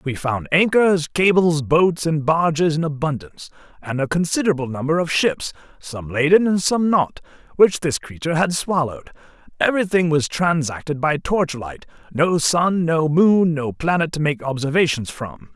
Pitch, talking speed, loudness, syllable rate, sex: 160 Hz, 160 wpm, -19 LUFS, 4.8 syllables/s, male